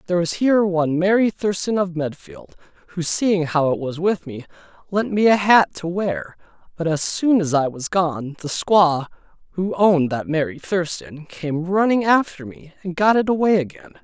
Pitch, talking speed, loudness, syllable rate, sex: 175 Hz, 190 wpm, -19 LUFS, 4.4 syllables/s, male